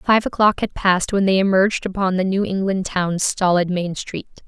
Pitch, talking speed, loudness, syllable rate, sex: 190 Hz, 200 wpm, -19 LUFS, 5.2 syllables/s, female